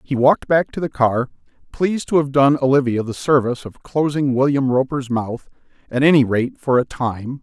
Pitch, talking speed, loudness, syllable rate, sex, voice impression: 135 Hz, 195 wpm, -18 LUFS, 5.2 syllables/s, male, very masculine, very middle-aged, very thick, tensed, very powerful, bright, soft, muffled, fluent, cool, slightly intellectual, refreshing, slightly sincere, calm, mature, slightly friendly, slightly reassuring, unique, slightly elegant, very wild, slightly sweet, lively, slightly strict, slightly intense